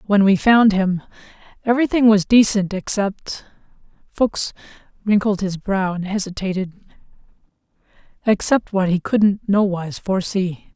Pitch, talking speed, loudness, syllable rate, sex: 200 Hz, 105 wpm, -18 LUFS, 4.8 syllables/s, female